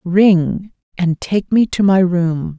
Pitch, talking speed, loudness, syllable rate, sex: 180 Hz, 165 wpm, -15 LUFS, 3.1 syllables/s, female